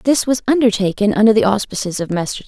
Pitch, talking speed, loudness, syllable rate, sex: 220 Hz, 195 wpm, -16 LUFS, 5.8 syllables/s, female